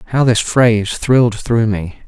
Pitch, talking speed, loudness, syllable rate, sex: 115 Hz, 175 wpm, -14 LUFS, 4.6 syllables/s, male